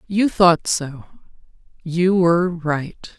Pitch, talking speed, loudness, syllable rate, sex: 170 Hz, 95 wpm, -18 LUFS, 3.0 syllables/s, female